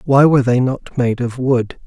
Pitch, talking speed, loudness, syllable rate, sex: 125 Hz, 225 wpm, -16 LUFS, 4.7 syllables/s, male